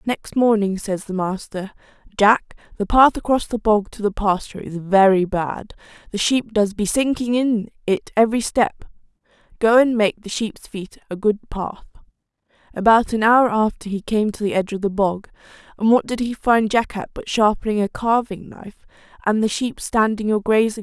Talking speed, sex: 190 wpm, female